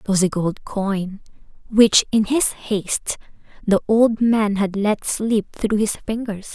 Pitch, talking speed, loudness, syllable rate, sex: 210 Hz, 165 wpm, -20 LUFS, 3.8 syllables/s, female